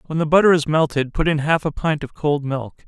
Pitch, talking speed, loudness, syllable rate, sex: 150 Hz, 270 wpm, -19 LUFS, 5.5 syllables/s, male